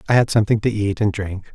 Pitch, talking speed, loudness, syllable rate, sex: 105 Hz, 270 wpm, -19 LUFS, 6.6 syllables/s, male